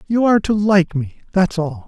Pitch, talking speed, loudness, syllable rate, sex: 185 Hz, 190 wpm, -17 LUFS, 5.2 syllables/s, male